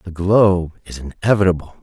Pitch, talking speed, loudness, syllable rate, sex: 90 Hz, 130 wpm, -16 LUFS, 5.5 syllables/s, male